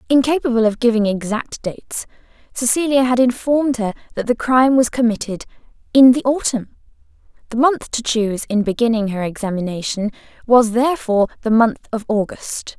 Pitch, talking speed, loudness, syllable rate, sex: 235 Hz, 145 wpm, -17 LUFS, 5.6 syllables/s, female